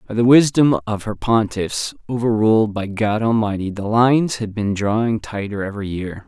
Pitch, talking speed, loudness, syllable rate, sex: 110 Hz, 180 wpm, -18 LUFS, 4.9 syllables/s, male